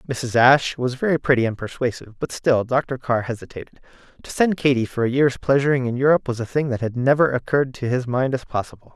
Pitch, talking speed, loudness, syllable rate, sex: 130 Hz, 220 wpm, -20 LUFS, 6.4 syllables/s, male